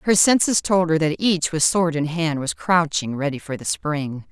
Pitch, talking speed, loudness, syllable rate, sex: 165 Hz, 225 wpm, -20 LUFS, 4.6 syllables/s, female